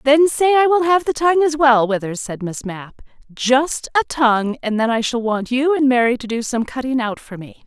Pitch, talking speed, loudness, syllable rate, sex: 255 Hz, 235 wpm, -17 LUFS, 5.1 syllables/s, female